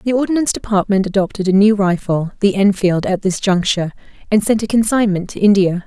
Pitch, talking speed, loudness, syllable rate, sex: 200 Hz, 185 wpm, -15 LUFS, 5.9 syllables/s, female